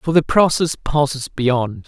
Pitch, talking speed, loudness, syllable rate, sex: 145 Hz, 160 wpm, -18 LUFS, 3.8 syllables/s, male